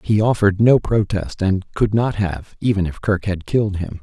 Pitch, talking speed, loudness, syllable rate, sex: 100 Hz, 210 wpm, -19 LUFS, 4.9 syllables/s, male